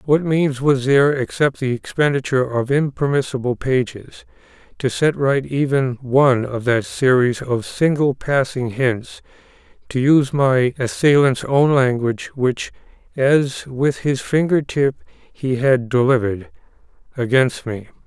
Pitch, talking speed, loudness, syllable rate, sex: 130 Hz, 130 wpm, -18 LUFS, 4.2 syllables/s, male